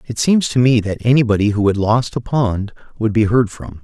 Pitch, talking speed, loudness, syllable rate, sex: 115 Hz, 235 wpm, -16 LUFS, 5.2 syllables/s, male